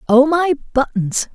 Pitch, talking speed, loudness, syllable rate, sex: 275 Hz, 135 wpm, -17 LUFS, 4.2 syllables/s, female